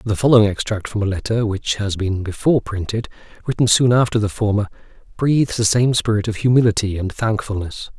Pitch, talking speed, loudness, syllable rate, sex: 110 Hz, 180 wpm, -18 LUFS, 5.9 syllables/s, male